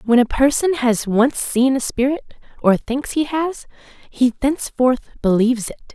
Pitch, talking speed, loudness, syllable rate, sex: 260 Hz, 140 wpm, -18 LUFS, 4.7 syllables/s, female